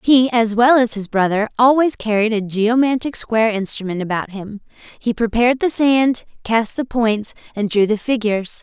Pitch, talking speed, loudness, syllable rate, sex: 230 Hz, 175 wpm, -17 LUFS, 4.9 syllables/s, female